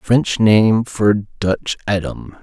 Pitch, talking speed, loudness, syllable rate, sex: 105 Hz, 125 wpm, -16 LUFS, 2.7 syllables/s, male